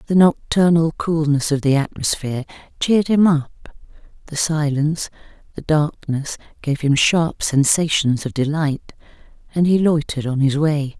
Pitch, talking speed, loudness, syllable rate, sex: 150 Hz, 135 wpm, -18 LUFS, 4.6 syllables/s, female